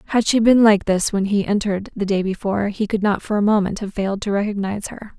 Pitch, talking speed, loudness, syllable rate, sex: 205 Hz, 255 wpm, -19 LUFS, 6.4 syllables/s, female